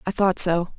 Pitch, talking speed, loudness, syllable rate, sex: 185 Hz, 230 wpm, -20 LUFS, 4.9 syllables/s, female